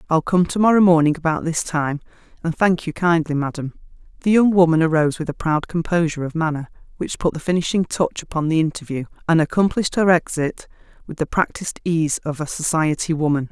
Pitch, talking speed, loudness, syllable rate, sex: 165 Hz, 190 wpm, -20 LUFS, 6.0 syllables/s, female